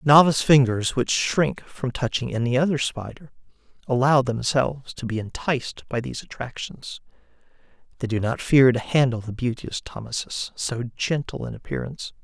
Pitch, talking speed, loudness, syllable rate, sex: 130 Hz, 145 wpm, -23 LUFS, 5.1 syllables/s, male